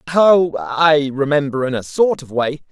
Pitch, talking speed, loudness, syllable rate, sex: 150 Hz, 175 wpm, -16 LUFS, 4.1 syllables/s, male